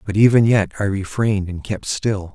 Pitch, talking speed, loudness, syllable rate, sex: 100 Hz, 205 wpm, -19 LUFS, 5.1 syllables/s, male